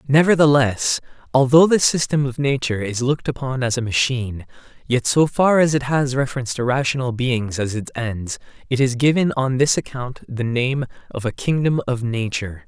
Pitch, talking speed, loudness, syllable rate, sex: 130 Hz, 180 wpm, -19 LUFS, 5.3 syllables/s, male